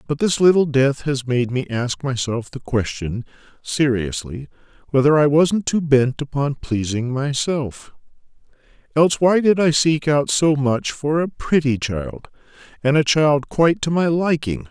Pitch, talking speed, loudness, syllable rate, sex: 140 Hz, 160 wpm, -19 LUFS, 4.3 syllables/s, male